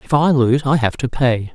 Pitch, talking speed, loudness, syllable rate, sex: 130 Hz, 270 wpm, -16 LUFS, 5.0 syllables/s, male